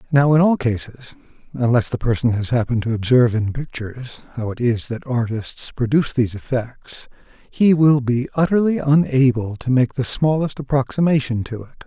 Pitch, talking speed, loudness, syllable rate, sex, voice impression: 130 Hz, 165 wpm, -19 LUFS, 5.3 syllables/s, male, very masculine, adult-like, slightly middle-aged, slightly thick, very tensed, slightly powerful, very bright, soft, very clear, very fluent, slightly raspy, slightly cool, intellectual, slightly refreshing, very sincere, slightly calm, slightly mature, very friendly, reassuring, unique, wild, very lively, intense, light